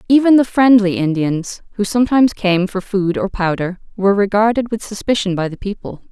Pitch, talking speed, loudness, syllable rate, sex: 205 Hz, 175 wpm, -16 LUFS, 5.6 syllables/s, female